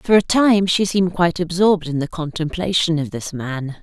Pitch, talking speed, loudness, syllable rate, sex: 170 Hz, 205 wpm, -18 LUFS, 5.3 syllables/s, female